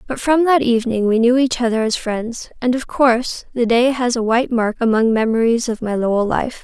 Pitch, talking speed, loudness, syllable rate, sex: 235 Hz, 225 wpm, -17 LUFS, 5.5 syllables/s, female